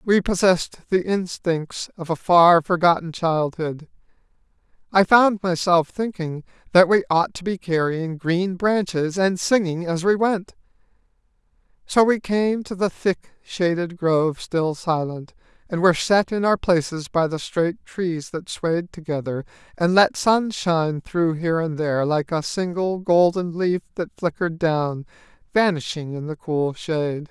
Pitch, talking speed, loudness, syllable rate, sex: 175 Hz, 150 wpm, -21 LUFS, 4.3 syllables/s, male